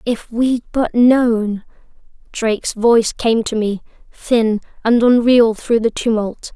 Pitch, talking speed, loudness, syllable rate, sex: 230 Hz, 135 wpm, -16 LUFS, 3.7 syllables/s, female